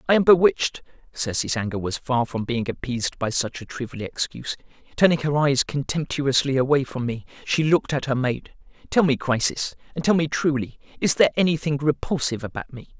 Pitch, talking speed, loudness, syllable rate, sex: 135 Hz, 185 wpm, -23 LUFS, 4.2 syllables/s, male